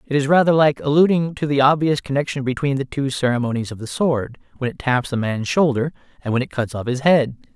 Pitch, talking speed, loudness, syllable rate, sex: 135 Hz, 230 wpm, -19 LUFS, 5.9 syllables/s, male